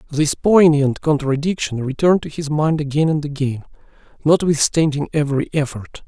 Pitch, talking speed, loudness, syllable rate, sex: 150 Hz, 130 wpm, -18 LUFS, 5.2 syllables/s, male